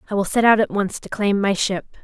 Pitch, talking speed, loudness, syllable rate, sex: 205 Hz, 295 wpm, -19 LUFS, 6.1 syllables/s, female